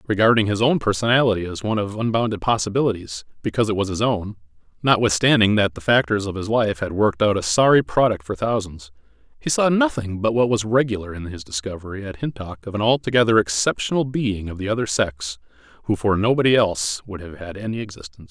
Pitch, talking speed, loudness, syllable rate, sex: 105 Hz, 185 wpm, -20 LUFS, 6.2 syllables/s, male